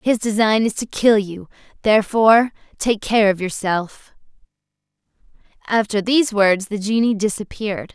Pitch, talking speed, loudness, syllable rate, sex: 210 Hz, 130 wpm, -18 LUFS, 4.9 syllables/s, female